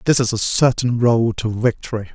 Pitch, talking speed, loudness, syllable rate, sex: 115 Hz, 195 wpm, -18 LUFS, 5.1 syllables/s, male